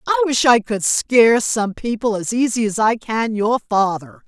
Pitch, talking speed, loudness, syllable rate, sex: 225 Hz, 195 wpm, -17 LUFS, 4.4 syllables/s, female